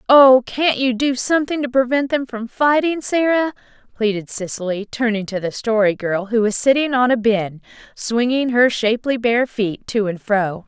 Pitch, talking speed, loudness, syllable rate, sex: 240 Hz, 180 wpm, -18 LUFS, 4.7 syllables/s, female